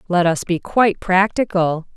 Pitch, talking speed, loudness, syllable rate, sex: 185 Hz, 155 wpm, -18 LUFS, 4.7 syllables/s, female